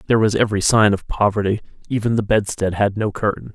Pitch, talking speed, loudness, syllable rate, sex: 105 Hz, 205 wpm, -19 LUFS, 6.5 syllables/s, male